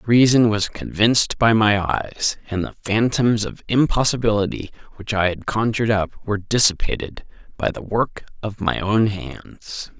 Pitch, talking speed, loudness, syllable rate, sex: 105 Hz, 155 wpm, -20 LUFS, 4.6 syllables/s, male